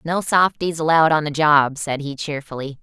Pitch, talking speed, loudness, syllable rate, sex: 155 Hz, 190 wpm, -18 LUFS, 5.2 syllables/s, female